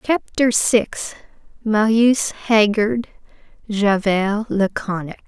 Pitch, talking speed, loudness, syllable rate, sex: 215 Hz, 55 wpm, -18 LUFS, 3.0 syllables/s, female